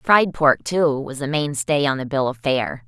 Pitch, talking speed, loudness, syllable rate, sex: 140 Hz, 250 wpm, -20 LUFS, 4.2 syllables/s, female